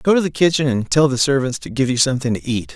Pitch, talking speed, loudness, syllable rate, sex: 135 Hz, 305 wpm, -18 LUFS, 6.6 syllables/s, male